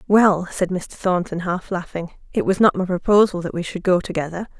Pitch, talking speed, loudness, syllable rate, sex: 185 Hz, 210 wpm, -20 LUFS, 5.4 syllables/s, female